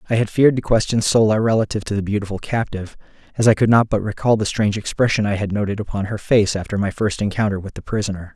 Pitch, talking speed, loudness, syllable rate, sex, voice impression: 105 Hz, 235 wpm, -19 LUFS, 7.0 syllables/s, male, masculine, adult-like, slightly weak, fluent, raspy, cool, mature, unique, wild, slightly kind, slightly modest